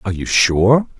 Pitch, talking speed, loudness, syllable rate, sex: 110 Hz, 180 wpm, -14 LUFS, 4.9 syllables/s, male